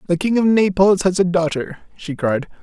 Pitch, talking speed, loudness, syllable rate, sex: 180 Hz, 205 wpm, -17 LUFS, 5.1 syllables/s, male